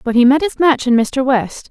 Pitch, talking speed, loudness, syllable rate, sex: 260 Hz, 280 wpm, -14 LUFS, 5.0 syllables/s, female